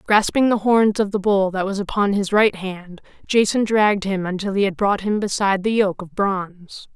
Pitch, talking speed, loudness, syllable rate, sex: 200 Hz, 215 wpm, -19 LUFS, 5.1 syllables/s, female